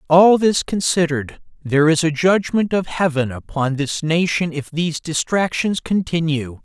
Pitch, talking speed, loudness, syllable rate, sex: 165 Hz, 145 wpm, -18 LUFS, 4.7 syllables/s, male